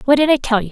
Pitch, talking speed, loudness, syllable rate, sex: 265 Hz, 420 wpm, -15 LUFS, 8.8 syllables/s, female